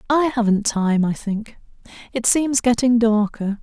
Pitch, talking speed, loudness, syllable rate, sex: 230 Hz, 150 wpm, -19 LUFS, 4.1 syllables/s, female